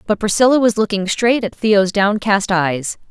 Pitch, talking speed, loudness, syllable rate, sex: 205 Hz, 175 wpm, -16 LUFS, 4.5 syllables/s, female